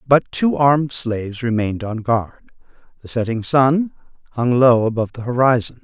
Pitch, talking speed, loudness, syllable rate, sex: 125 Hz, 155 wpm, -18 LUFS, 5.3 syllables/s, male